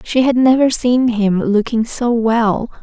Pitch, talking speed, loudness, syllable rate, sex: 235 Hz, 170 wpm, -15 LUFS, 3.8 syllables/s, female